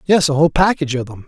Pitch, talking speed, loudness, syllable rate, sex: 155 Hz, 280 wpm, -16 LUFS, 7.8 syllables/s, male